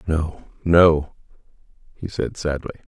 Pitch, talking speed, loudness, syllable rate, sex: 80 Hz, 100 wpm, -21 LUFS, 3.7 syllables/s, male